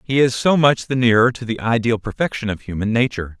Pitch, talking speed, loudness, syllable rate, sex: 120 Hz, 230 wpm, -18 LUFS, 6.1 syllables/s, male